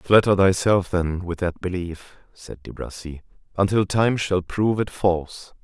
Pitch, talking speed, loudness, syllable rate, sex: 95 Hz, 160 wpm, -22 LUFS, 4.4 syllables/s, male